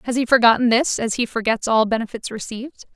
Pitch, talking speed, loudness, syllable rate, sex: 235 Hz, 205 wpm, -19 LUFS, 6.2 syllables/s, female